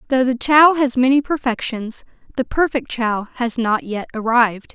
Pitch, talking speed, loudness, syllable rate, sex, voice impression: 245 Hz, 165 wpm, -18 LUFS, 4.7 syllables/s, female, feminine, slightly adult-like, clear, slightly cute, slightly refreshing, friendly